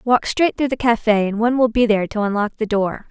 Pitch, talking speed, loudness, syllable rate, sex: 225 Hz, 270 wpm, -18 LUFS, 6.0 syllables/s, female